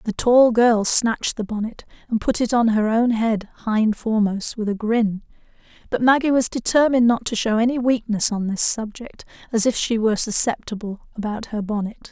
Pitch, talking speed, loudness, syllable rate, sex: 225 Hz, 190 wpm, -20 LUFS, 5.2 syllables/s, female